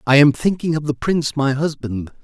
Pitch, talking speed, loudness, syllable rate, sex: 140 Hz, 215 wpm, -18 LUFS, 5.5 syllables/s, male